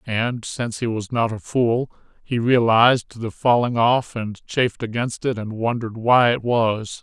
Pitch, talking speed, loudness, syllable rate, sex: 115 Hz, 180 wpm, -20 LUFS, 4.4 syllables/s, male